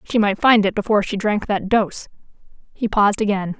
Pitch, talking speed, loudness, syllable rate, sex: 205 Hz, 200 wpm, -18 LUFS, 5.8 syllables/s, female